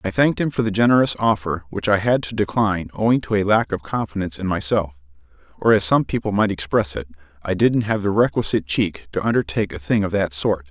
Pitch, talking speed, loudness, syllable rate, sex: 95 Hz, 225 wpm, -20 LUFS, 6.3 syllables/s, male